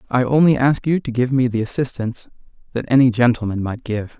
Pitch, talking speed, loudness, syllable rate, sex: 125 Hz, 200 wpm, -18 LUFS, 5.8 syllables/s, male